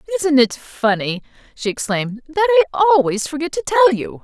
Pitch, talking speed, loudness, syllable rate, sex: 290 Hz, 170 wpm, -17 LUFS, 5.6 syllables/s, female